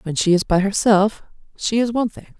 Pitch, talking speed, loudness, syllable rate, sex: 205 Hz, 225 wpm, -19 LUFS, 5.7 syllables/s, female